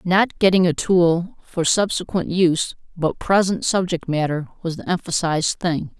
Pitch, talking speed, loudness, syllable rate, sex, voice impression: 175 Hz, 150 wpm, -20 LUFS, 4.6 syllables/s, female, feminine, middle-aged, tensed, powerful, slightly hard, clear, fluent, intellectual, calm, slightly wild, lively, sharp